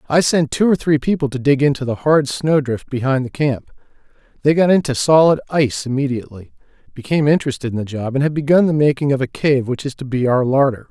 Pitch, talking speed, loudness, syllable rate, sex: 140 Hz, 225 wpm, -17 LUFS, 6.2 syllables/s, male